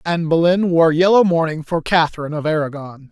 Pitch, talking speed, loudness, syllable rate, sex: 165 Hz, 175 wpm, -16 LUFS, 6.0 syllables/s, male